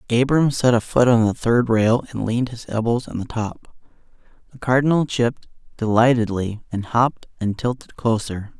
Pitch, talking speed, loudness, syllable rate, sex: 120 Hz, 170 wpm, -20 LUFS, 5.3 syllables/s, male